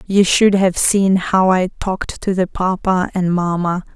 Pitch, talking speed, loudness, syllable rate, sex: 185 Hz, 180 wpm, -16 LUFS, 4.1 syllables/s, female